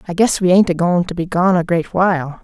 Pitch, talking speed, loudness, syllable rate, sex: 175 Hz, 295 wpm, -15 LUFS, 5.7 syllables/s, female